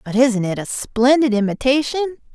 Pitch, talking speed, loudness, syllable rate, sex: 250 Hz, 155 wpm, -18 LUFS, 5.2 syllables/s, female